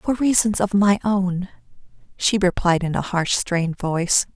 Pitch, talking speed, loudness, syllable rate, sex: 190 Hz, 165 wpm, -20 LUFS, 4.6 syllables/s, female